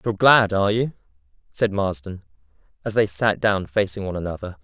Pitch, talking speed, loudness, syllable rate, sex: 100 Hz, 170 wpm, -21 LUFS, 6.0 syllables/s, male